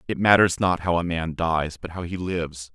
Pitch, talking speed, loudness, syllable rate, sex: 85 Hz, 240 wpm, -23 LUFS, 5.1 syllables/s, male